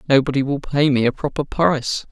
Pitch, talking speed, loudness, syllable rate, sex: 140 Hz, 200 wpm, -19 LUFS, 5.8 syllables/s, male